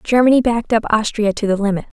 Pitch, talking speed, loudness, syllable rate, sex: 220 Hz, 210 wpm, -16 LUFS, 6.7 syllables/s, female